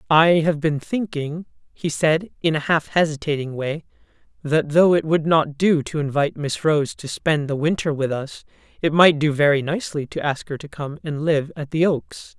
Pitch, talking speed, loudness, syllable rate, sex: 155 Hz, 205 wpm, -21 LUFS, 4.8 syllables/s, female